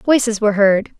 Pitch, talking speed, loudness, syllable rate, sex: 215 Hz, 180 wpm, -15 LUFS, 5.3 syllables/s, female